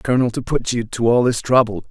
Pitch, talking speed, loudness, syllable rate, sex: 115 Hz, 250 wpm, -18 LUFS, 6.0 syllables/s, male